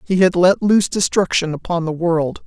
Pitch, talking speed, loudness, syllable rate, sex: 175 Hz, 195 wpm, -17 LUFS, 5.2 syllables/s, female